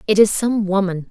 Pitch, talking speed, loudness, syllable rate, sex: 200 Hz, 215 wpm, -17 LUFS, 5.4 syllables/s, female